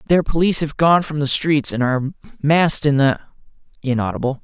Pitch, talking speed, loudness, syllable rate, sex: 145 Hz, 175 wpm, -18 LUFS, 5.8 syllables/s, male